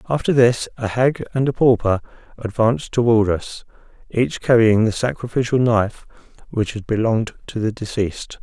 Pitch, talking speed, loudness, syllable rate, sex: 115 Hz, 150 wpm, -19 LUFS, 5.2 syllables/s, male